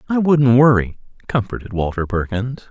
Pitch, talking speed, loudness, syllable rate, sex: 120 Hz, 135 wpm, -17 LUFS, 4.9 syllables/s, male